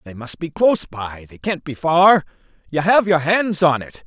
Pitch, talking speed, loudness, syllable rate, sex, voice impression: 155 Hz, 220 wpm, -18 LUFS, 4.7 syllables/s, male, masculine, adult-like, tensed, powerful, bright, clear, cool, calm, slightly mature, reassuring, wild, lively, kind